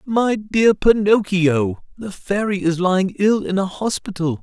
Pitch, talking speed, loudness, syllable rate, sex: 195 Hz, 150 wpm, -18 LUFS, 4.1 syllables/s, male